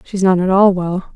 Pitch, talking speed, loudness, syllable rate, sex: 185 Hz, 260 wpm, -14 LUFS, 5.1 syllables/s, female